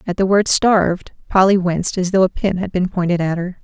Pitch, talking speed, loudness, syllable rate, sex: 185 Hz, 250 wpm, -17 LUFS, 5.7 syllables/s, female